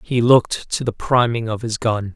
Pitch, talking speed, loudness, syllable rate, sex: 115 Hz, 225 wpm, -18 LUFS, 4.9 syllables/s, male